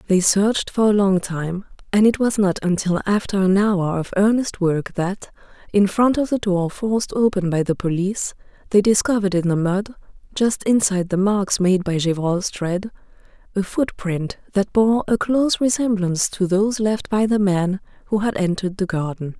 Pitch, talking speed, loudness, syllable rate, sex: 195 Hz, 185 wpm, -20 LUFS, 5.0 syllables/s, female